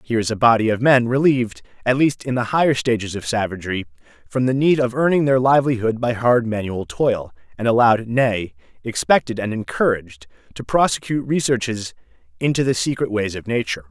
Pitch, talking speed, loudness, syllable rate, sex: 115 Hz, 175 wpm, -19 LUFS, 6.0 syllables/s, male